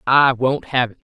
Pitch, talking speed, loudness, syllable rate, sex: 130 Hz, 215 wpm, -18 LUFS, 4.7 syllables/s, male